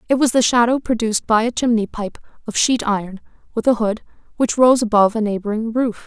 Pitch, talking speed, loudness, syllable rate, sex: 225 Hz, 210 wpm, -18 LUFS, 6.1 syllables/s, female